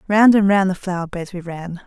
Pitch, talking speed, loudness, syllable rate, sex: 185 Hz, 255 wpm, -17 LUFS, 5.2 syllables/s, female